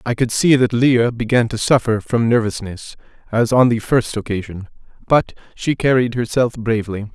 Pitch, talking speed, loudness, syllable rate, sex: 115 Hz, 170 wpm, -17 LUFS, 5.1 syllables/s, male